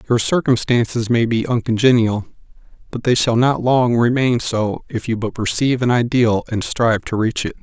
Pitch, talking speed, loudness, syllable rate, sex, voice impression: 120 Hz, 180 wpm, -17 LUFS, 5.1 syllables/s, male, very masculine, very adult-like, slightly old, very thick, slightly tensed, slightly weak, slightly dark, slightly hard, slightly muffled, fluent, slightly raspy, cool, intellectual, sincere, very calm, very mature, friendly, reassuring, unique, slightly elegant, wild, slightly sweet, kind, modest